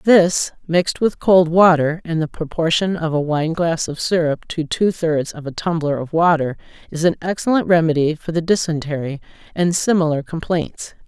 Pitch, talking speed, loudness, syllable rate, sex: 165 Hz, 175 wpm, -18 LUFS, 4.9 syllables/s, female